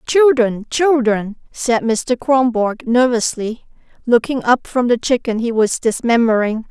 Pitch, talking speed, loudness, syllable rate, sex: 240 Hz, 125 wpm, -16 LUFS, 4.1 syllables/s, female